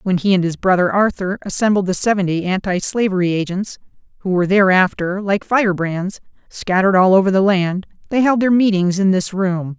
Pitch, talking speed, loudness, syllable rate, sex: 190 Hz, 180 wpm, -16 LUFS, 5.5 syllables/s, female